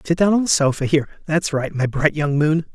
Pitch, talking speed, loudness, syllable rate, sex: 155 Hz, 265 wpm, -19 LUFS, 5.9 syllables/s, male